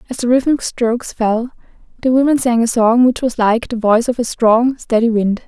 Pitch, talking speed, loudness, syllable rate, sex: 235 Hz, 220 wpm, -15 LUFS, 5.3 syllables/s, female